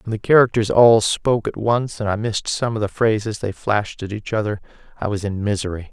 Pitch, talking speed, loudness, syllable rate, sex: 105 Hz, 235 wpm, -19 LUFS, 5.9 syllables/s, male